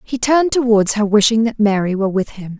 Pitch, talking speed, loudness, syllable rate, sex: 220 Hz, 230 wpm, -15 LUFS, 6.0 syllables/s, female